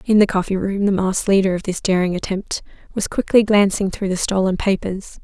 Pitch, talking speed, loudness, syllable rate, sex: 195 Hz, 205 wpm, -19 LUFS, 5.7 syllables/s, female